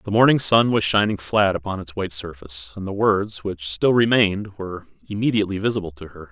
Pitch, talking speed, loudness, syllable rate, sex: 100 Hz, 200 wpm, -20 LUFS, 6.0 syllables/s, male